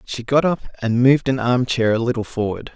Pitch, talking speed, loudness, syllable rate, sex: 125 Hz, 240 wpm, -19 LUFS, 5.6 syllables/s, male